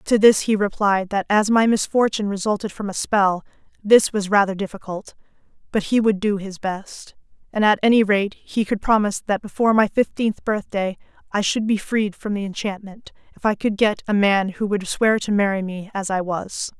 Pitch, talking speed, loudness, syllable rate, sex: 205 Hz, 200 wpm, -20 LUFS, 5.2 syllables/s, female